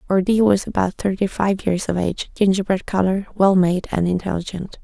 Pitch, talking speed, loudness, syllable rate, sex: 190 Hz, 175 wpm, -20 LUFS, 5.4 syllables/s, female